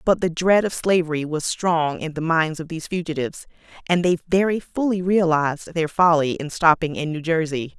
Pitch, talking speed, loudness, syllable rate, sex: 165 Hz, 195 wpm, -21 LUFS, 5.3 syllables/s, female